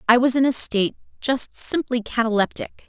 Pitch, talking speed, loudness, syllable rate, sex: 240 Hz, 165 wpm, -20 LUFS, 5.4 syllables/s, female